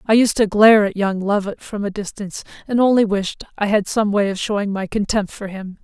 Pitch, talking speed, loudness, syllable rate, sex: 205 Hz, 235 wpm, -18 LUFS, 5.6 syllables/s, female